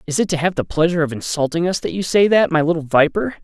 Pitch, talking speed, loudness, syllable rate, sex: 165 Hz, 280 wpm, -18 LUFS, 6.8 syllables/s, male